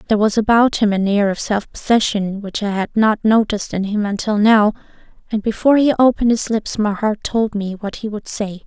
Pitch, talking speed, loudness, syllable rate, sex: 210 Hz, 220 wpm, -17 LUFS, 5.5 syllables/s, female